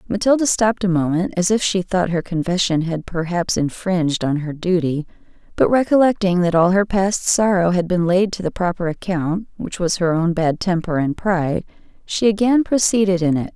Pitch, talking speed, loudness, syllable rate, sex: 180 Hz, 190 wpm, -18 LUFS, 5.2 syllables/s, female